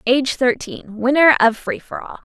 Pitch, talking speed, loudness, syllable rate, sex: 260 Hz, 180 wpm, -17 LUFS, 4.9 syllables/s, female